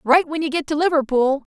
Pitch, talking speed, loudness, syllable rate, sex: 300 Hz, 230 wpm, -19 LUFS, 6.5 syllables/s, female